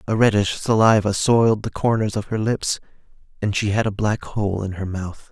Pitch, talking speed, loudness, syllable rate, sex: 105 Hz, 205 wpm, -20 LUFS, 5.1 syllables/s, male